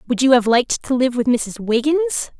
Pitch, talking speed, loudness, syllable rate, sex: 255 Hz, 225 wpm, -17 LUFS, 6.0 syllables/s, female